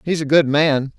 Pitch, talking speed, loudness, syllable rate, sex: 150 Hz, 245 wpm, -16 LUFS, 4.7 syllables/s, male